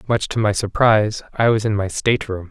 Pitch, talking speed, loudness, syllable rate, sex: 105 Hz, 215 wpm, -18 LUFS, 5.8 syllables/s, male